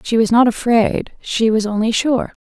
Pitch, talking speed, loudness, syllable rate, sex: 230 Hz, 200 wpm, -16 LUFS, 4.5 syllables/s, female